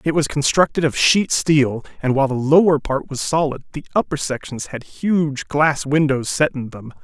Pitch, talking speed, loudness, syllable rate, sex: 145 Hz, 195 wpm, -18 LUFS, 4.8 syllables/s, male